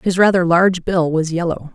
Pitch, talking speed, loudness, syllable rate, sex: 175 Hz, 205 wpm, -16 LUFS, 5.5 syllables/s, female